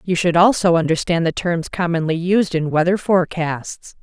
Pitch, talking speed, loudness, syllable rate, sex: 170 Hz, 165 wpm, -18 LUFS, 4.9 syllables/s, female